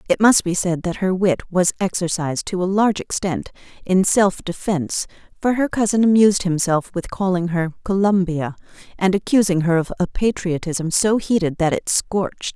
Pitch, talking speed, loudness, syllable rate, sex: 185 Hz, 170 wpm, -19 LUFS, 5.1 syllables/s, female